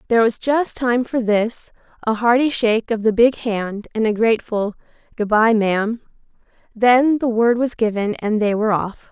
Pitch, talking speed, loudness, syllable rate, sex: 225 Hz, 185 wpm, -18 LUFS, 4.9 syllables/s, female